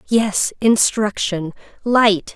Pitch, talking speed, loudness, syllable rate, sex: 210 Hz, 75 wpm, -17 LUFS, 2.8 syllables/s, female